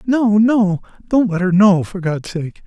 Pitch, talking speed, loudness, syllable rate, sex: 195 Hz, 205 wpm, -16 LUFS, 3.9 syllables/s, male